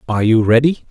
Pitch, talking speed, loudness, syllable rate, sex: 120 Hz, 200 wpm, -13 LUFS, 6.9 syllables/s, male